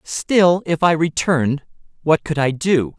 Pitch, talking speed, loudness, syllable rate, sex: 155 Hz, 160 wpm, -18 LUFS, 4.1 syllables/s, male